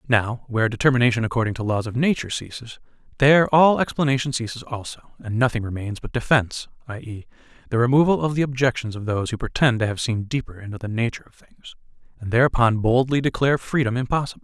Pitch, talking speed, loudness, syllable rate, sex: 120 Hz, 185 wpm, -21 LUFS, 6.7 syllables/s, male